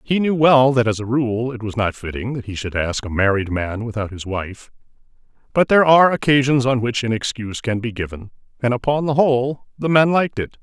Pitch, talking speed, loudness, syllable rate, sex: 120 Hz, 225 wpm, -19 LUFS, 5.7 syllables/s, male